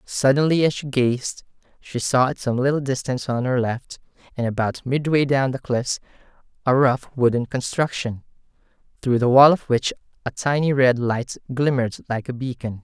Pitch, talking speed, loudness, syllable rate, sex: 130 Hz, 170 wpm, -21 LUFS, 5.0 syllables/s, male